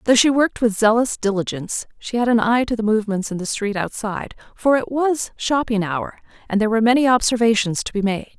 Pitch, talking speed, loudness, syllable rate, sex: 225 Hz, 215 wpm, -19 LUFS, 6.1 syllables/s, female